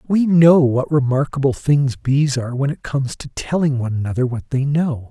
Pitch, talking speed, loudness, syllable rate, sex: 140 Hz, 200 wpm, -18 LUFS, 5.3 syllables/s, male